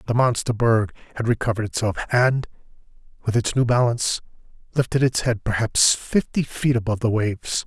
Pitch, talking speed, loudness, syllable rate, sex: 115 Hz, 155 wpm, -21 LUFS, 5.7 syllables/s, male